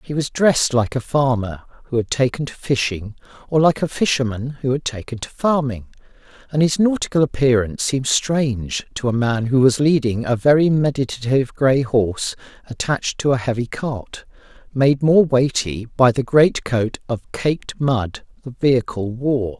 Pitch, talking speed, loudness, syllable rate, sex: 130 Hz, 165 wpm, -19 LUFS, 4.9 syllables/s, male